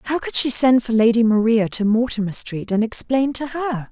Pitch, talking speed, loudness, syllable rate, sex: 240 Hz, 215 wpm, -18 LUFS, 4.9 syllables/s, female